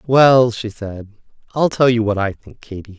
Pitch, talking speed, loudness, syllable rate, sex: 115 Hz, 200 wpm, -16 LUFS, 4.4 syllables/s, male